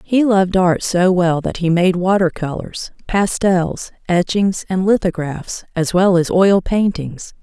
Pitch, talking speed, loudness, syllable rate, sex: 185 Hz, 155 wpm, -16 LUFS, 4.0 syllables/s, female